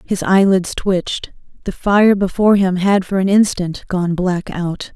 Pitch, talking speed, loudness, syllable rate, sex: 190 Hz, 170 wpm, -16 LUFS, 4.3 syllables/s, female